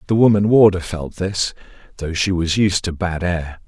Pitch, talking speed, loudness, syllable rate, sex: 90 Hz, 195 wpm, -18 LUFS, 4.7 syllables/s, male